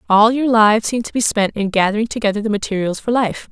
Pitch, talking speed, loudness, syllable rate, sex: 215 Hz, 240 wpm, -16 LUFS, 6.3 syllables/s, female